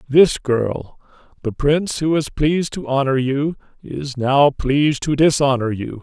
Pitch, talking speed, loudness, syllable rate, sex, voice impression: 140 Hz, 160 wpm, -18 LUFS, 4.3 syllables/s, male, very masculine, middle-aged, very thick, slightly relaxed, slightly weak, slightly dark, soft, muffled, fluent, raspy, very cool, intellectual, very refreshing, sincere, very calm, very mature, very friendly, very reassuring, unique, elegant, wild, very sweet, lively, kind, slightly intense